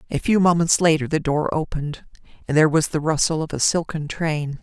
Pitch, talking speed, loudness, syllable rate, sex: 155 Hz, 205 wpm, -20 LUFS, 5.7 syllables/s, female